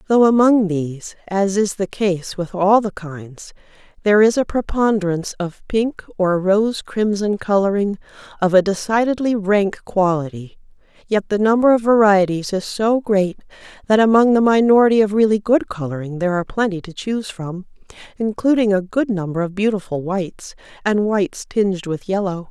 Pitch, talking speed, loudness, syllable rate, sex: 200 Hz, 160 wpm, -18 LUFS, 5.1 syllables/s, female